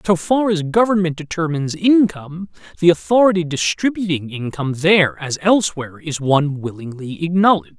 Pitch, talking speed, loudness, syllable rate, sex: 165 Hz, 130 wpm, -17 LUFS, 5.8 syllables/s, male